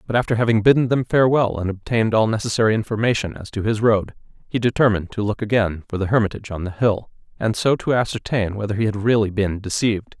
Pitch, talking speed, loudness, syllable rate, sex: 110 Hz, 210 wpm, -20 LUFS, 6.6 syllables/s, male